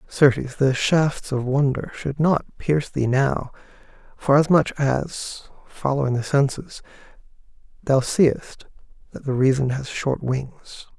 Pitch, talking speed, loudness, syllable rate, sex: 140 Hz, 125 wpm, -21 LUFS, 3.9 syllables/s, male